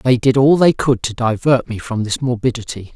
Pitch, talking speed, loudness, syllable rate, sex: 120 Hz, 225 wpm, -16 LUFS, 5.2 syllables/s, male